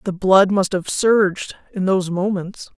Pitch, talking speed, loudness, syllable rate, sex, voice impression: 190 Hz, 170 wpm, -18 LUFS, 4.6 syllables/s, female, feminine, gender-neutral, slightly young, slightly adult-like, thin, slightly tensed, weak, slightly dark, slightly hard, slightly muffled, slightly fluent, slightly cute, slightly intellectual, calm, slightly friendly, very unique, slightly lively, slightly strict, slightly sharp, modest